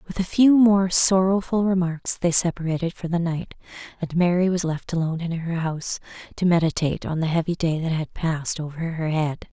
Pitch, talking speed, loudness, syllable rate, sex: 170 Hz, 195 wpm, -22 LUFS, 5.5 syllables/s, female